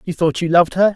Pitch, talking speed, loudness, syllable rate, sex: 175 Hz, 315 wpm, -16 LUFS, 7.2 syllables/s, male